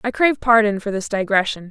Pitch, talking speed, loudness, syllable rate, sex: 215 Hz, 210 wpm, -18 LUFS, 6.2 syllables/s, female